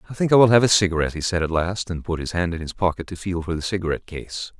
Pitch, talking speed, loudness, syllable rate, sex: 90 Hz, 315 wpm, -21 LUFS, 7.1 syllables/s, male